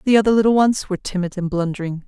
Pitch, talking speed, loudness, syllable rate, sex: 195 Hz, 230 wpm, -19 LUFS, 7.2 syllables/s, female